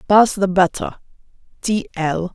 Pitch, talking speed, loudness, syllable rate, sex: 190 Hz, 130 wpm, -19 LUFS, 4.2 syllables/s, female